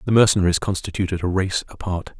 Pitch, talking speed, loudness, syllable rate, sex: 95 Hz, 165 wpm, -21 LUFS, 6.6 syllables/s, male